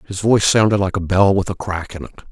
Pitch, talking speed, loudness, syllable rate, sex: 95 Hz, 285 wpm, -17 LUFS, 6.6 syllables/s, male